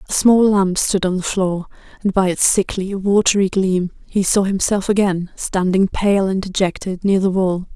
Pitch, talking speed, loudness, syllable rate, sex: 190 Hz, 185 wpm, -17 LUFS, 4.6 syllables/s, female